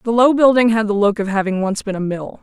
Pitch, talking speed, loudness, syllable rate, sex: 215 Hz, 295 wpm, -16 LUFS, 6.0 syllables/s, female